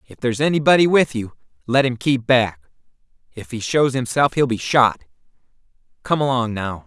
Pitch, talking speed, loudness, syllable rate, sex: 125 Hz, 165 wpm, -18 LUFS, 5.2 syllables/s, male